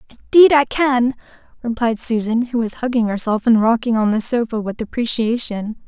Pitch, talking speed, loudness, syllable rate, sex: 235 Hz, 165 wpm, -17 LUFS, 5.5 syllables/s, female